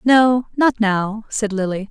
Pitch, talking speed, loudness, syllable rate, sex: 220 Hz, 160 wpm, -18 LUFS, 3.0 syllables/s, female